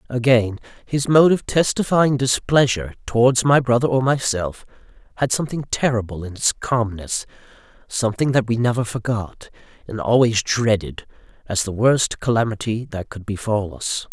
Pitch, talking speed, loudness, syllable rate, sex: 115 Hz, 140 wpm, -20 LUFS, 4.9 syllables/s, male